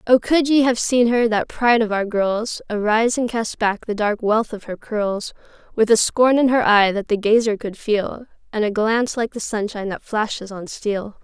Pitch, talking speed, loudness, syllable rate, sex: 220 Hz, 220 wpm, -19 LUFS, 4.9 syllables/s, female